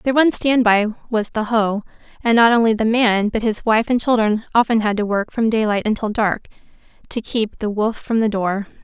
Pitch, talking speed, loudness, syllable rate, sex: 220 Hz, 210 wpm, -18 LUFS, 5.2 syllables/s, female